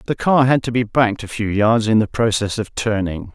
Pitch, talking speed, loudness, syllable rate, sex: 110 Hz, 250 wpm, -18 LUFS, 5.3 syllables/s, male